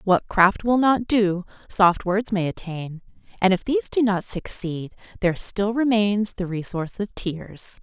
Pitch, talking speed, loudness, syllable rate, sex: 200 Hz, 170 wpm, -22 LUFS, 4.3 syllables/s, female